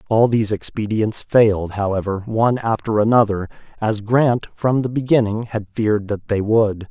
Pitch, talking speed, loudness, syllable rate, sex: 110 Hz, 155 wpm, -19 LUFS, 4.9 syllables/s, male